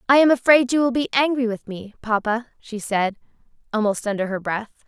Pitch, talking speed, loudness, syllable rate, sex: 230 Hz, 195 wpm, -21 LUFS, 5.6 syllables/s, female